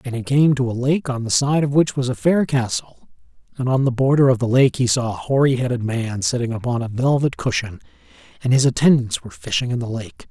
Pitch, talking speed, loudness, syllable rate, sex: 125 Hz, 240 wpm, -19 LUFS, 5.8 syllables/s, male